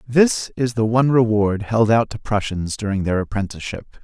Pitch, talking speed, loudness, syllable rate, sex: 110 Hz, 180 wpm, -19 LUFS, 5.2 syllables/s, male